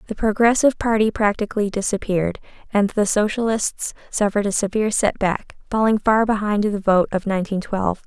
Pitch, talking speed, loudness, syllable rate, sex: 210 Hz, 155 wpm, -20 LUFS, 5.8 syllables/s, female